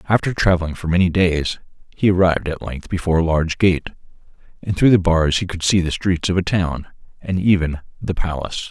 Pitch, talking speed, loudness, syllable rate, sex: 85 Hz, 200 wpm, -19 LUFS, 5.9 syllables/s, male